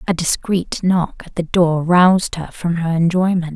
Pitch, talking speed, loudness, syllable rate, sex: 175 Hz, 185 wpm, -17 LUFS, 4.5 syllables/s, female